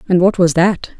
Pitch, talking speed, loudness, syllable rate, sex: 180 Hz, 240 wpm, -14 LUFS, 4.9 syllables/s, female